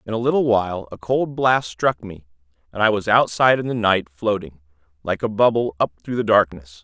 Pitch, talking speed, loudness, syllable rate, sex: 100 Hz, 210 wpm, -20 LUFS, 5.5 syllables/s, male